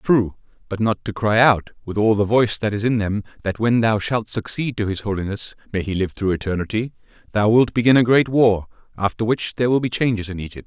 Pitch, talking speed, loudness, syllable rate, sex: 110 Hz, 220 wpm, -20 LUFS, 5.8 syllables/s, male